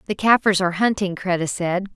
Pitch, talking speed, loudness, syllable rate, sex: 190 Hz, 185 wpm, -20 LUFS, 5.9 syllables/s, female